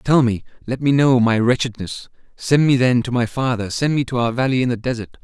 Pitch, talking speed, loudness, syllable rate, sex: 125 Hz, 230 wpm, -18 LUFS, 5.7 syllables/s, male